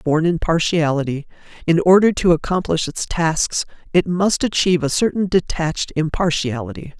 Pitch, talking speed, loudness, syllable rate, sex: 165 Hz, 135 wpm, -18 LUFS, 5.0 syllables/s, male